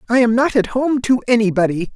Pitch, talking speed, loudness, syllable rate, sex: 230 Hz, 215 wpm, -16 LUFS, 5.9 syllables/s, male